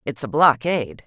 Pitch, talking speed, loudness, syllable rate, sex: 135 Hz, 170 wpm, -19 LUFS, 5.3 syllables/s, female